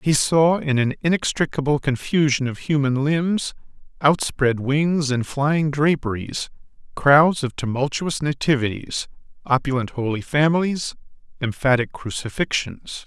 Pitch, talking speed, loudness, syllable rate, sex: 140 Hz, 105 wpm, -21 LUFS, 4.3 syllables/s, male